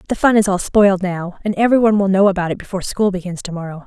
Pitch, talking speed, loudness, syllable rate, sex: 195 Hz, 265 wpm, -16 LUFS, 7.2 syllables/s, female